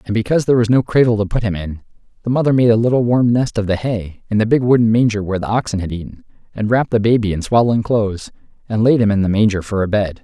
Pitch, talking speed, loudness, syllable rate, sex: 110 Hz, 270 wpm, -16 LUFS, 6.9 syllables/s, male